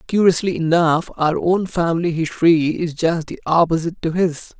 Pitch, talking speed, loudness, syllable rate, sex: 170 Hz, 155 wpm, -18 LUFS, 5.1 syllables/s, male